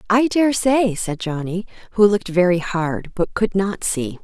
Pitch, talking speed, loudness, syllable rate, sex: 195 Hz, 170 wpm, -19 LUFS, 4.6 syllables/s, female